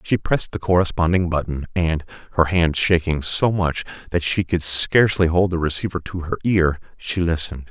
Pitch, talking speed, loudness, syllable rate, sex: 85 Hz, 180 wpm, -20 LUFS, 5.3 syllables/s, male